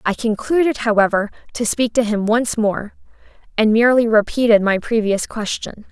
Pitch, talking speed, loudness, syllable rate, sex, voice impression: 220 Hz, 150 wpm, -17 LUFS, 5.0 syllables/s, female, very feminine, slightly young, very thin, very tensed, powerful, very bright, very hard, very clear, fluent, slightly raspy, cute, slightly cool, intellectual, very refreshing, sincere, calm, friendly, reassuring, very unique, slightly elegant, wild, sweet, very lively, strict, intense, slightly sharp, light